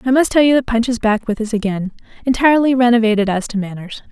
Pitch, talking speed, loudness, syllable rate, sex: 230 Hz, 235 wpm, -16 LUFS, 6.6 syllables/s, female